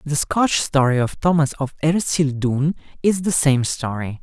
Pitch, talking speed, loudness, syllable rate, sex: 145 Hz, 155 wpm, -19 LUFS, 4.6 syllables/s, male